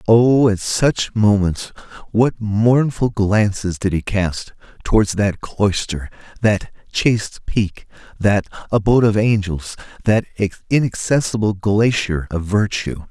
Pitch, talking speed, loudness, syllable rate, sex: 105 Hz, 115 wpm, -18 LUFS, 3.8 syllables/s, male